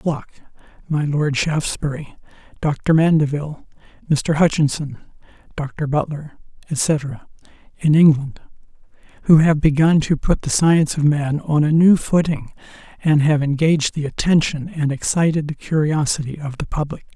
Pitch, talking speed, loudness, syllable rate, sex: 150 Hz, 135 wpm, -18 LUFS, 4.8 syllables/s, male